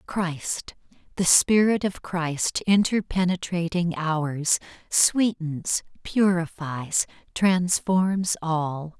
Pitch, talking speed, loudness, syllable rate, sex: 175 Hz, 75 wpm, -24 LUFS, 2.8 syllables/s, female